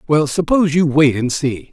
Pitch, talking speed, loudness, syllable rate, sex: 145 Hz, 210 wpm, -15 LUFS, 5.2 syllables/s, male